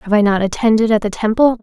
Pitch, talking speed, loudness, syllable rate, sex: 215 Hz, 260 wpm, -15 LUFS, 6.8 syllables/s, female